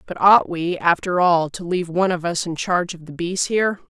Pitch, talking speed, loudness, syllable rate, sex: 175 Hz, 245 wpm, -20 LUFS, 5.7 syllables/s, female